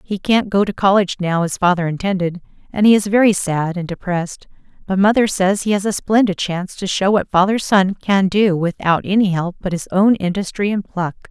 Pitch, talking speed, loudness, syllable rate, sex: 190 Hz, 210 wpm, -17 LUFS, 5.5 syllables/s, female